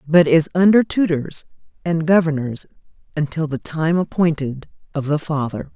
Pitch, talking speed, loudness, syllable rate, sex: 155 Hz, 135 wpm, -19 LUFS, 4.8 syllables/s, female